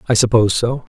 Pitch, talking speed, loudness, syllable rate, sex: 115 Hz, 190 wpm, -16 LUFS, 7.0 syllables/s, male